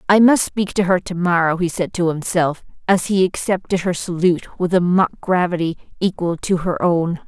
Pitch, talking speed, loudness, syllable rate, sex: 180 Hz, 200 wpm, -18 LUFS, 5.0 syllables/s, female